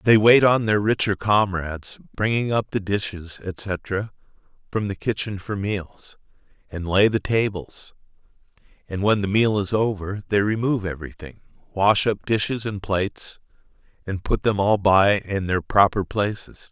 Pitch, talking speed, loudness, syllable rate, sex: 100 Hz, 155 wpm, -22 LUFS, 4.4 syllables/s, male